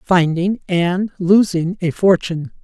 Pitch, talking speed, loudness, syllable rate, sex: 180 Hz, 115 wpm, -17 LUFS, 4.0 syllables/s, female